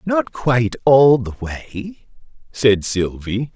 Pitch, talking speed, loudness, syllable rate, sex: 125 Hz, 120 wpm, -17 LUFS, 3.2 syllables/s, male